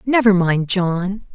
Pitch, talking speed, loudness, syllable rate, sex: 195 Hz, 135 wpm, -17 LUFS, 3.5 syllables/s, female